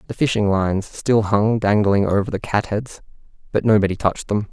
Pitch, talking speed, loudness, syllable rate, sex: 105 Hz, 175 wpm, -19 LUFS, 5.5 syllables/s, male